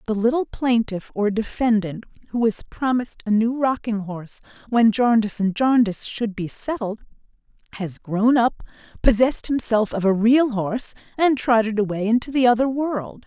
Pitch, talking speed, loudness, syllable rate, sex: 225 Hz, 160 wpm, -21 LUFS, 5.2 syllables/s, female